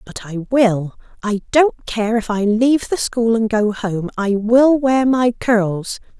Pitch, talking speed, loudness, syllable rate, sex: 225 Hz, 185 wpm, -17 LUFS, 3.8 syllables/s, female